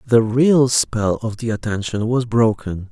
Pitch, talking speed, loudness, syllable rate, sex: 115 Hz, 165 wpm, -18 LUFS, 3.9 syllables/s, male